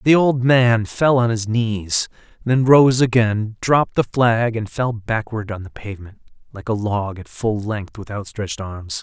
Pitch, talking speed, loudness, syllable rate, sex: 110 Hz, 185 wpm, -19 LUFS, 4.3 syllables/s, male